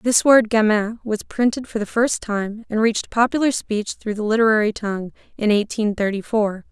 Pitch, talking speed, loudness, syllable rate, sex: 220 Hz, 190 wpm, -20 LUFS, 5.1 syllables/s, female